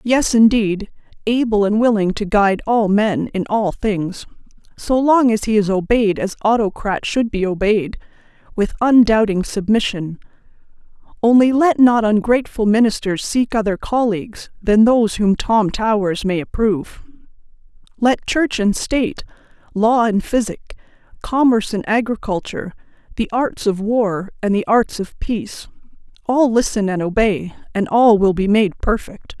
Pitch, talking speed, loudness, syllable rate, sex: 215 Hz, 140 wpm, -17 LUFS, 4.6 syllables/s, female